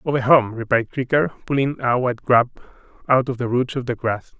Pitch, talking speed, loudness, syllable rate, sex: 125 Hz, 205 wpm, -20 LUFS, 5.6 syllables/s, male